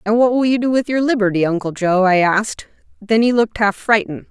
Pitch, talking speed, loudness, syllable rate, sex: 215 Hz, 235 wpm, -16 LUFS, 6.2 syllables/s, female